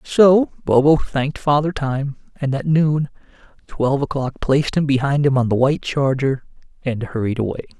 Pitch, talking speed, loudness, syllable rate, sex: 140 Hz, 160 wpm, -19 LUFS, 5.1 syllables/s, male